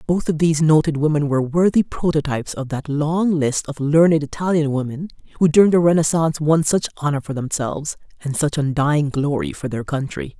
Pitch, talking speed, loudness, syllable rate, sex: 150 Hz, 185 wpm, -19 LUFS, 5.6 syllables/s, female